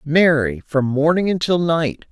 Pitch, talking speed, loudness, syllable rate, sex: 155 Hz, 140 wpm, -18 LUFS, 4.0 syllables/s, male